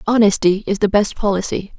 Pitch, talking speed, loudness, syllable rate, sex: 205 Hz, 170 wpm, -17 LUFS, 5.6 syllables/s, female